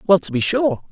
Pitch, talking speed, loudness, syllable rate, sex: 165 Hz, 265 wpm, -18 LUFS, 5.4 syllables/s, male